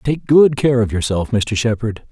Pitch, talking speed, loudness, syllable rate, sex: 120 Hz, 200 wpm, -16 LUFS, 4.6 syllables/s, male